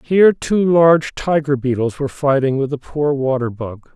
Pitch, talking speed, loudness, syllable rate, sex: 140 Hz, 180 wpm, -16 LUFS, 5.0 syllables/s, male